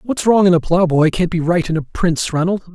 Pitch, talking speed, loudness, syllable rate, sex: 175 Hz, 265 wpm, -16 LUFS, 5.9 syllables/s, male